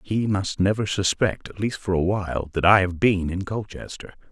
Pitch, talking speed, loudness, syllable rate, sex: 95 Hz, 210 wpm, -23 LUFS, 5.0 syllables/s, male